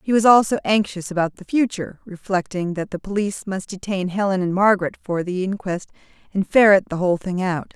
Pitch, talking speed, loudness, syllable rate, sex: 190 Hz, 195 wpm, -20 LUFS, 5.9 syllables/s, female